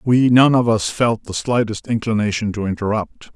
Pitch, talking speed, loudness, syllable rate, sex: 110 Hz, 180 wpm, -18 LUFS, 4.9 syllables/s, male